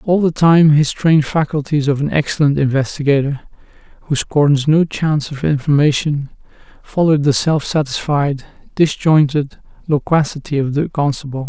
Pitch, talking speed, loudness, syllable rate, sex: 145 Hz, 130 wpm, -15 LUFS, 5.0 syllables/s, male